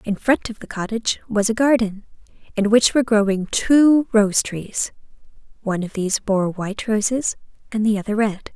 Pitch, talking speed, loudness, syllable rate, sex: 215 Hz, 175 wpm, -20 LUFS, 5.2 syllables/s, female